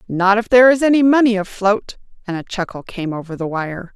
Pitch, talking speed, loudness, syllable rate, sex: 205 Hz, 210 wpm, -16 LUFS, 5.8 syllables/s, female